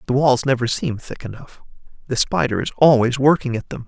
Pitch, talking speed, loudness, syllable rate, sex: 125 Hz, 200 wpm, -18 LUFS, 5.8 syllables/s, male